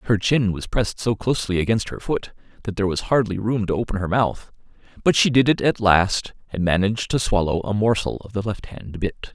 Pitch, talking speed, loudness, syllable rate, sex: 105 Hz, 220 wpm, -21 LUFS, 5.7 syllables/s, male